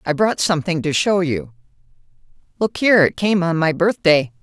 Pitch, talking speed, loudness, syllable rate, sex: 170 Hz, 175 wpm, -17 LUFS, 5.4 syllables/s, female